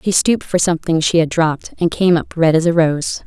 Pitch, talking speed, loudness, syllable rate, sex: 165 Hz, 260 wpm, -16 LUFS, 5.8 syllables/s, female